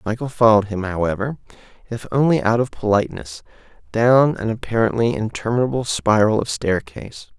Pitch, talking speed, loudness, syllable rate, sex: 110 Hz, 130 wpm, -19 LUFS, 5.7 syllables/s, male